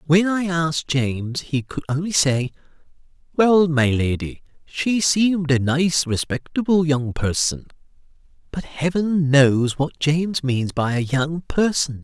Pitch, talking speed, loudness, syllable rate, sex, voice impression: 150 Hz, 140 wpm, -20 LUFS, 4.0 syllables/s, male, very masculine, old, very thick, very relaxed, very weak, very dark, very soft, very muffled, raspy, cool, very intellectual, sincere, very calm, very mature, very friendly, reassuring, very unique, very elegant, wild, very sweet, slightly lively, very kind, very modest